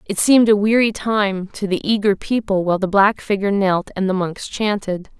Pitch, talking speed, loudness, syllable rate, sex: 200 Hz, 210 wpm, -18 LUFS, 5.2 syllables/s, female